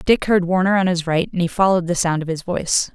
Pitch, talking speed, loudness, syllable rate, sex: 175 Hz, 285 wpm, -18 LUFS, 6.4 syllables/s, female